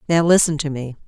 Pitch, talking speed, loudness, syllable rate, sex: 155 Hz, 225 wpm, -17 LUFS, 6.2 syllables/s, female